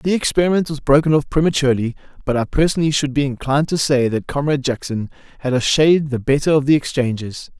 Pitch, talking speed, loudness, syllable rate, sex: 140 Hz, 195 wpm, -18 LUFS, 6.6 syllables/s, male